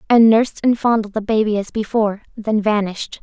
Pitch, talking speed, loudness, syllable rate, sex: 215 Hz, 185 wpm, -17 LUFS, 5.9 syllables/s, female